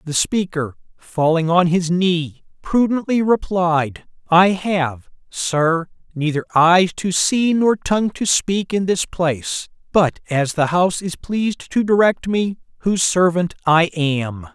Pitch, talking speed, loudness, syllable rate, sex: 180 Hz, 145 wpm, -18 LUFS, 3.9 syllables/s, male